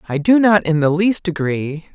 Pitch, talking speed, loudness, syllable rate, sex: 175 Hz, 215 wpm, -16 LUFS, 4.6 syllables/s, male